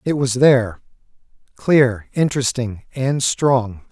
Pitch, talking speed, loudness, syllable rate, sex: 125 Hz, 90 wpm, -18 LUFS, 3.8 syllables/s, male